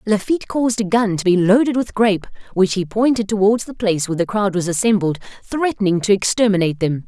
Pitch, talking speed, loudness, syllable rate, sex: 205 Hz, 205 wpm, -18 LUFS, 6.4 syllables/s, female